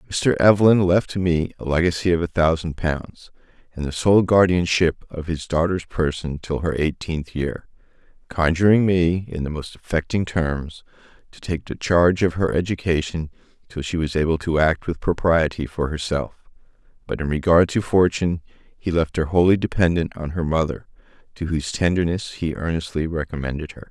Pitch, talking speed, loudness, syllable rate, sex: 85 Hz, 170 wpm, -21 LUFS, 5.1 syllables/s, male